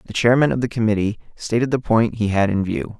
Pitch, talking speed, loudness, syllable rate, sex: 110 Hz, 240 wpm, -19 LUFS, 6.0 syllables/s, male